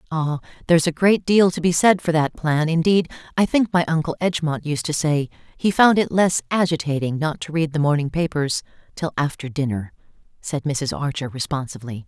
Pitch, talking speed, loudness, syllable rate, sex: 155 Hz, 185 wpm, -21 LUFS, 5.4 syllables/s, female